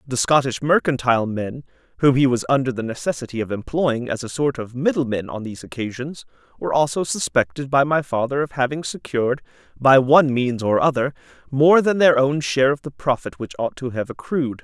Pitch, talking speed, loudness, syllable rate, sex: 135 Hz, 195 wpm, -20 LUFS, 5.7 syllables/s, male